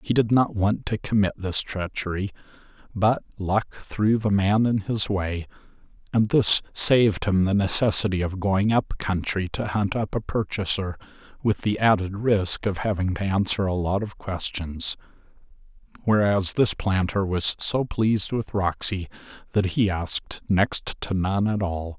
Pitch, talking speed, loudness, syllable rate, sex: 100 Hz, 160 wpm, -23 LUFS, 4.3 syllables/s, male